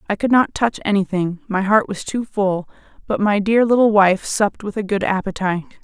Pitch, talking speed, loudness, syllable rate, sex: 205 Hz, 205 wpm, -18 LUFS, 5.4 syllables/s, female